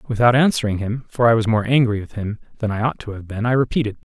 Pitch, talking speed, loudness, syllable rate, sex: 115 Hz, 235 wpm, -19 LUFS, 6.5 syllables/s, male